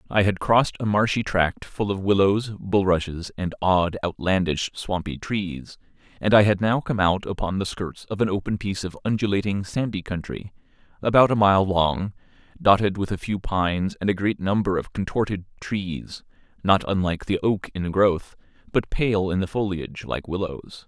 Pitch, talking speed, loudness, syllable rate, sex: 95 Hz, 175 wpm, -23 LUFS, 4.9 syllables/s, male